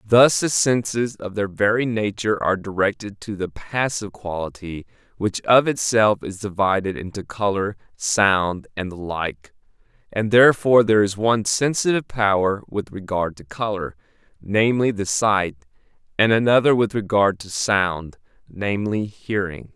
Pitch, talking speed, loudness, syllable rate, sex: 105 Hz, 140 wpm, -20 LUFS, 4.8 syllables/s, male